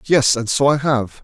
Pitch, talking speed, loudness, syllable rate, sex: 130 Hz, 240 wpm, -16 LUFS, 4.2 syllables/s, male